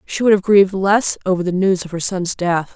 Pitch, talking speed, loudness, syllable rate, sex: 190 Hz, 260 wpm, -16 LUFS, 5.4 syllables/s, female